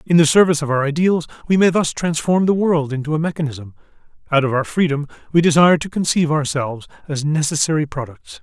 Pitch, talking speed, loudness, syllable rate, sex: 155 Hz, 190 wpm, -18 LUFS, 6.4 syllables/s, male